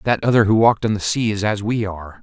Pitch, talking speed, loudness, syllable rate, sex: 105 Hz, 295 wpm, -18 LUFS, 6.6 syllables/s, male